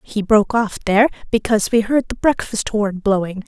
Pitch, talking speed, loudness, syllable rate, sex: 215 Hz, 190 wpm, -18 LUFS, 5.6 syllables/s, female